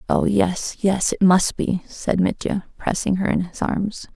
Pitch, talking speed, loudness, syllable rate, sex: 190 Hz, 190 wpm, -21 LUFS, 4.0 syllables/s, female